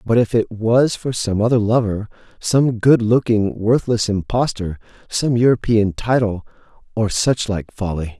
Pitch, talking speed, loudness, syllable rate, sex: 110 Hz, 140 wpm, -18 LUFS, 4.6 syllables/s, male